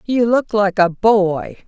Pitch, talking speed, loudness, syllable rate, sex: 205 Hz, 180 wpm, -16 LUFS, 3.4 syllables/s, female